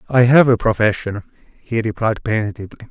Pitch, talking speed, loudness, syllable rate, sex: 115 Hz, 145 wpm, -17 LUFS, 5.5 syllables/s, male